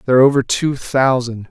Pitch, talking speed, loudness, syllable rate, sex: 130 Hz, 200 wpm, -15 LUFS, 6.6 syllables/s, male